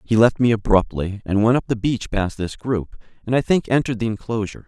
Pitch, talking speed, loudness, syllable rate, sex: 110 Hz, 230 wpm, -20 LUFS, 6.0 syllables/s, male